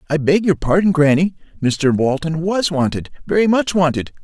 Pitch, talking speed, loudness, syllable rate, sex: 165 Hz, 155 wpm, -17 LUFS, 5.1 syllables/s, male